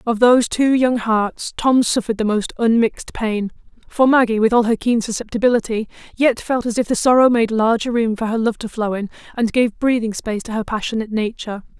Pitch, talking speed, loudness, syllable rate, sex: 230 Hz, 210 wpm, -18 LUFS, 5.8 syllables/s, female